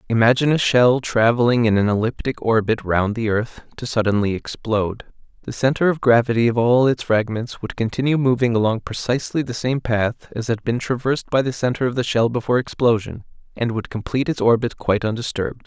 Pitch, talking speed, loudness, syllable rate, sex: 120 Hz, 190 wpm, -20 LUFS, 5.9 syllables/s, male